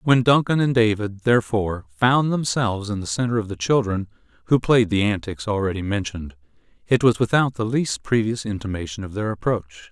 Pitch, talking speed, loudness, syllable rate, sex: 110 Hz, 175 wpm, -21 LUFS, 5.6 syllables/s, male